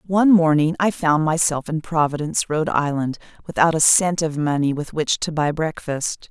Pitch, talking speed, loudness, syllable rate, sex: 160 Hz, 180 wpm, -19 LUFS, 5.1 syllables/s, female